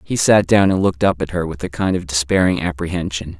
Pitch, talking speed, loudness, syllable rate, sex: 85 Hz, 250 wpm, -17 LUFS, 6.1 syllables/s, male